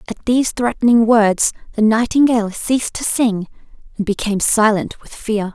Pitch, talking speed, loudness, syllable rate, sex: 220 Hz, 150 wpm, -16 LUFS, 5.1 syllables/s, female